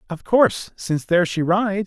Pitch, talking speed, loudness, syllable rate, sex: 190 Hz, 195 wpm, -19 LUFS, 5.9 syllables/s, male